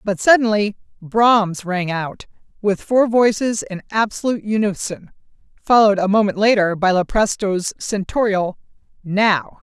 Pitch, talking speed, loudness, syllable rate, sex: 205 Hz, 115 wpm, -18 LUFS, 4.5 syllables/s, female